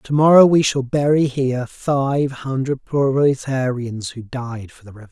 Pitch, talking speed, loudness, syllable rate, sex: 130 Hz, 165 wpm, -18 LUFS, 4.7 syllables/s, male